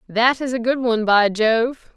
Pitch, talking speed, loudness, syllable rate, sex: 235 Hz, 215 wpm, -18 LUFS, 4.5 syllables/s, female